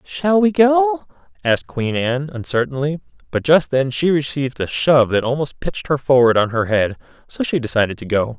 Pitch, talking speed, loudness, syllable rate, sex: 140 Hz, 195 wpm, -18 LUFS, 5.4 syllables/s, male